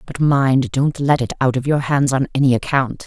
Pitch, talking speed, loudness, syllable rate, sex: 135 Hz, 235 wpm, -17 LUFS, 5.0 syllables/s, female